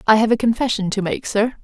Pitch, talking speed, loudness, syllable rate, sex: 220 Hz, 255 wpm, -19 LUFS, 6.1 syllables/s, female